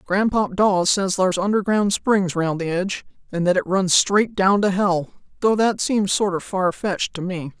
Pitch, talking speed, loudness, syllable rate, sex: 190 Hz, 195 wpm, -20 LUFS, 4.8 syllables/s, female